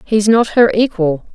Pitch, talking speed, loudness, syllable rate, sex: 210 Hz, 180 wpm, -13 LUFS, 4.3 syllables/s, female